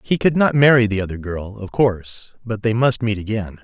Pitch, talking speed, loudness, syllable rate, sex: 110 Hz, 230 wpm, -18 LUFS, 5.3 syllables/s, male